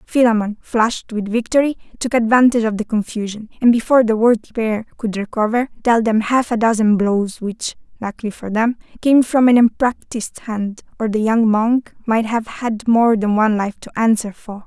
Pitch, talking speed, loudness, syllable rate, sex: 225 Hz, 185 wpm, -17 LUFS, 5.2 syllables/s, female